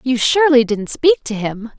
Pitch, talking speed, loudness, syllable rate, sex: 255 Hz, 200 wpm, -15 LUFS, 5.2 syllables/s, female